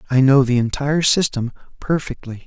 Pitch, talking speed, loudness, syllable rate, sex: 135 Hz, 145 wpm, -17 LUFS, 5.6 syllables/s, male